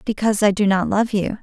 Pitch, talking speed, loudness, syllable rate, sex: 205 Hz, 255 wpm, -18 LUFS, 6.2 syllables/s, female